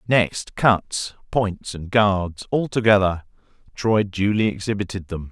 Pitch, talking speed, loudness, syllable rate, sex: 100 Hz, 115 wpm, -21 LUFS, 3.8 syllables/s, male